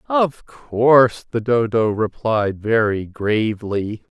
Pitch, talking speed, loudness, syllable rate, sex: 115 Hz, 100 wpm, -19 LUFS, 3.4 syllables/s, male